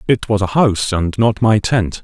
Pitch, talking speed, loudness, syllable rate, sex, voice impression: 105 Hz, 235 wpm, -15 LUFS, 4.8 syllables/s, male, very masculine, slightly old, very thick, tensed, powerful, slightly dark, soft, slightly muffled, fluent, slightly raspy, very cool, intellectual, slightly refreshing, sincere, calm, mature, very friendly, very reassuring, very unique, elegant, very wild, very sweet, lively, kind